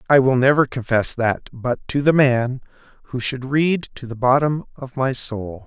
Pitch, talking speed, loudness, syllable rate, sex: 130 Hz, 180 wpm, -19 LUFS, 4.4 syllables/s, male